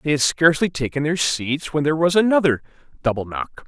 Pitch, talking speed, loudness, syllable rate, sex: 150 Hz, 195 wpm, -20 LUFS, 6.0 syllables/s, male